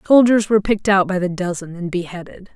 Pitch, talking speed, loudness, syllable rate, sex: 190 Hz, 210 wpm, -18 LUFS, 6.4 syllables/s, female